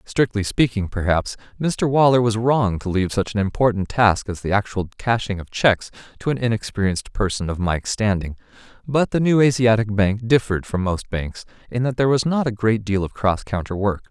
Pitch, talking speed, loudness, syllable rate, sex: 110 Hz, 200 wpm, -20 LUFS, 5.6 syllables/s, male